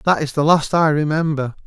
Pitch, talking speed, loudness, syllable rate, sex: 150 Hz, 215 wpm, -17 LUFS, 5.4 syllables/s, male